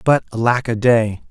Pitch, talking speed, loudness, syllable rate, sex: 115 Hz, 185 wpm, -17 LUFS, 4.7 syllables/s, male